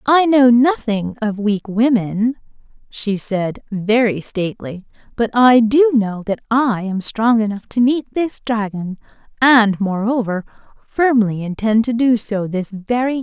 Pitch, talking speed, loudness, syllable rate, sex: 225 Hz, 150 wpm, -17 LUFS, 4.1 syllables/s, female